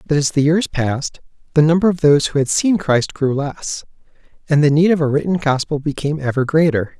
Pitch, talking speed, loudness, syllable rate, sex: 150 Hz, 215 wpm, -17 LUFS, 5.8 syllables/s, male